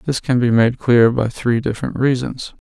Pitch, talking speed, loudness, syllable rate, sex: 120 Hz, 200 wpm, -17 LUFS, 4.7 syllables/s, male